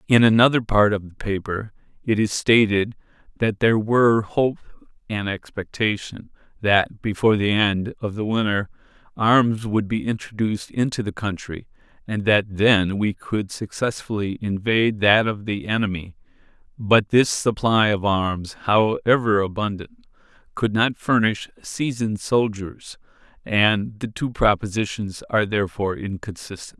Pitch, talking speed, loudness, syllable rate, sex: 105 Hz, 130 wpm, -21 LUFS, 4.5 syllables/s, male